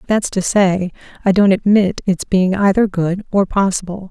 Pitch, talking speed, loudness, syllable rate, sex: 190 Hz, 175 wpm, -16 LUFS, 4.6 syllables/s, female